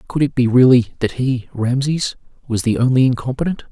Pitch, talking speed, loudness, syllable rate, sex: 125 Hz, 180 wpm, -17 LUFS, 5.8 syllables/s, male